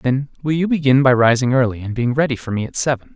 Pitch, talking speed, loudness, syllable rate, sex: 130 Hz, 265 wpm, -17 LUFS, 6.4 syllables/s, male